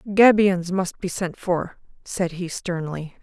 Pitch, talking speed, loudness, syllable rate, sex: 180 Hz, 150 wpm, -22 LUFS, 3.8 syllables/s, female